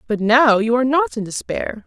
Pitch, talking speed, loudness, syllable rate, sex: 230 Hz, 225 wpm, -17 LUFS, 5.3 syllables/s, female